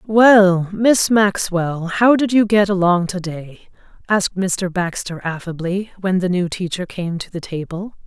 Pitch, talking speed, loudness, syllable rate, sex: 190 Hz, 155 wpm, -17 LUFS, 4.1 syllables/s, female